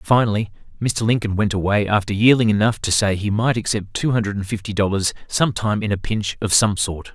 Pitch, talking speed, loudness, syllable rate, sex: 105 Hz, 210 wpm, -19 LUFS, 5.9 syllables/s, male